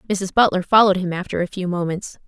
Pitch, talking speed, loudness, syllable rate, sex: 185 Hz, 210 wpm, -19 LUFS, 6.5 syllables/s, female